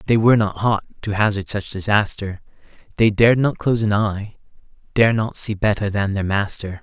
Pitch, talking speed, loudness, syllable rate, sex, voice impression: 105 Hz, 175 wpm, -19 LUFS, 5.6 syllables/s, male, masculine, adult-like, slightly refreshing, slightly calm, kind